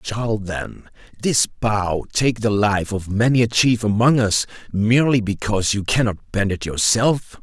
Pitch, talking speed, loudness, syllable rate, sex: 110 Hz, 160 wpm, -19 LUFS, 4.3 syllables/s, male